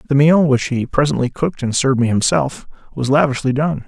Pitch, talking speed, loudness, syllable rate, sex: 135 Hz, 200 wpm, -16 LUFS, 5.9 syllables/s, male